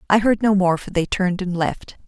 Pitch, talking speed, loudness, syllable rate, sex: 190 Hz, 260 wpm, -20 LUFS, 5.5 syllables/s, female